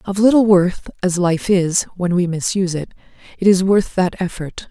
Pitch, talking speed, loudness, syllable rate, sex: 185 Hz, 190 wpm, -17 LUFS, 4.8 syllables/s, female